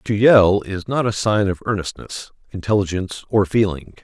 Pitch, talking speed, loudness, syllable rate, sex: 100 Hz, 165 wpm, -18 LUFS, 5.0 syllables/s, male